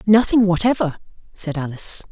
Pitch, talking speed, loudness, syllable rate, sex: 185 Hz, 115 wpm, -19 LUFS, 5.6 syllables/s, male